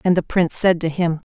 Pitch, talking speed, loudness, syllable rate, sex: 170 Hz, 275 wpm, -18 LUFS, 6.1 syllables/s, female